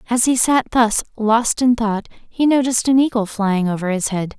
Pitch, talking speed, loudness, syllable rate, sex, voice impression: 230 Hz, 205 wpm, -17 LUFS, 4.9 syllables/s, female, feminine, slightly adult-like, slightly powerful, unique, slightly intense